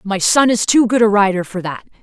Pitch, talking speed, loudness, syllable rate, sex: 210 Hz, 265 wpm, -14 LUFS, 5.6 syllables/s, female